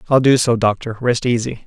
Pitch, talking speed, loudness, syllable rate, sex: 120 Hz, 215 wpm, -17 LUFS, 5.6 syllables/s, male